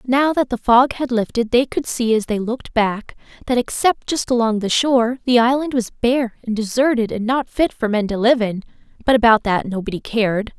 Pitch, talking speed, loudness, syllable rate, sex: 235 Hz, 215 wpm, -18 LUFS, 5.2 syllables/s, female